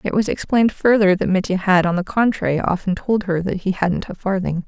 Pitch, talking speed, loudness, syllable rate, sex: 190 Hz, 230 wpm, -19 LUFS, 5.7 syllables/s, female